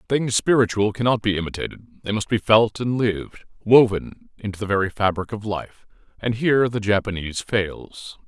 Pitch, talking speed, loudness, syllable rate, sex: 105 Hz, 165 wpm, -21 LUFS, 5.4 syllables/s, male